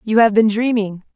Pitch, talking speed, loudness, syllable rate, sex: 215 Hz, 205 wpm, -16 LUFS, 5.2 syllables/s, female